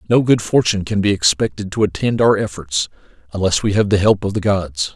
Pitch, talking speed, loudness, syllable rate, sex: 100 Hz, 220 wpm, -17 LUFS, 5.8 syllables/s, male